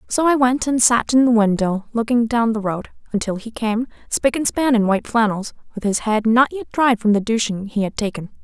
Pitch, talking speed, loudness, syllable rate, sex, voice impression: 230 Hz, 235 wpm, -19 LUFS, 5.3 syllables/s, female, feminine, slightly young, slightly relaxed, hard, fluent, slightly raspy, intellectual, lively, slightly strict, intense, sharp